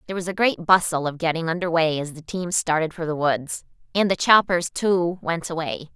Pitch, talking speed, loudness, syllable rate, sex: 170 Hz, 220 wpm, -22 LUFS, 5.3 syllables/s, female